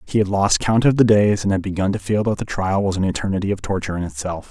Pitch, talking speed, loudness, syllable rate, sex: 100 Hz, 295 wpm, -19 LUFS, 6.7 syllables/s, male